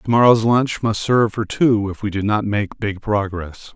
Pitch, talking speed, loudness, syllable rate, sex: 105 Hz, 225 wpm, -18 LUFS, 4.7 syllables/s, male